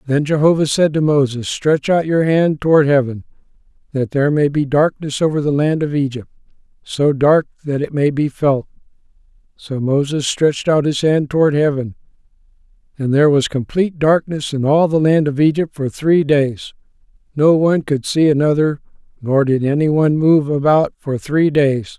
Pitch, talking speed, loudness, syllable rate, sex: 145 Hz, 175 wpm, -16 LUFS, 5.1 syllables/s, male